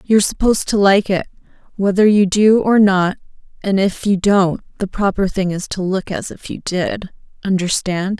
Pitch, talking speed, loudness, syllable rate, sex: 195 Hz, 185 wpm, -16 LUFS, 4.8 syllables/s, female